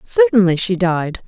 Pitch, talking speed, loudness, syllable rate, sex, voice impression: 205 Hz, 140 wpm, -15 LUFS, 4.3 syllables/s, female, very feminine, adult-like, very thin, tensed, slightly weak, bright, slightly hard, very clear, very fluent, cute, intellectual, very refreshing, sincere, calm, very friendly, very reassuring, unique, elegant, slightly wild, slightly sweet, lively, kind, slightly sharp, light